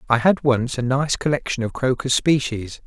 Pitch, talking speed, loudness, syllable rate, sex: 130 Hz, 190 wpm, -20 LUFS, 4.9 syllables/s, male